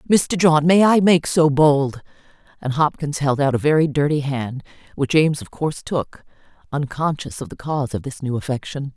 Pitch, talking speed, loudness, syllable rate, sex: 150 Hz, 190 wpm, -19 LUFS, 5.2 syllables/s, female